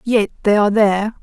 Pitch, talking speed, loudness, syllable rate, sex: 210 Hz, 195 wpm, -15 LUFS, 6.4 syllables/s, female